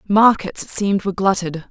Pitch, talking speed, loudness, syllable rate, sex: 195 Hz, 175 wpm, -18 LUFS, 5.9 syllables/s, female